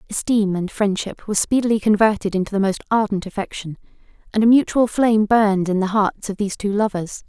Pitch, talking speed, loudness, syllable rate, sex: 205 Hz, 190 wpm, -19 LUFS, 6.1 syllables/s, female